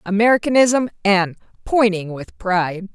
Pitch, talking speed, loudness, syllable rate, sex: 205 Hz, 100 wpm, -18 LUFS, 4.6 syllables/s, female